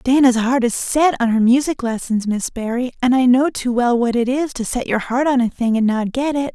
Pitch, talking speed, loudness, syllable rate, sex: 245 Hz, 265 wpm, -17 LUFS, 5.2 syllables/s, female